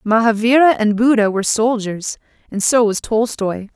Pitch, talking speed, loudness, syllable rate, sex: 220 Hz, 145 wpm, -16 LUFS, 4.9 syllables/s, female